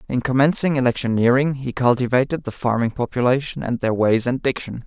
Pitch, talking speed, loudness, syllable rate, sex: 125 Hz, 160 wpm, -20 LUFS, 5.8 syllables/s, male